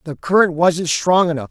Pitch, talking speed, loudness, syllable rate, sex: 170 Hz, 200 wpm, -16 LUFS, 5.0 syllables/s, male